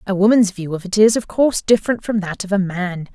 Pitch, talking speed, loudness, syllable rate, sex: 200 Hz, 265 wpm, -17 LUFS, 6.1 syllables/s, female